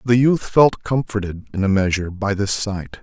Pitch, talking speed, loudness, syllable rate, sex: 105 Hz, 200 wpm, -19 LUFS, 5.0 syllables/s, male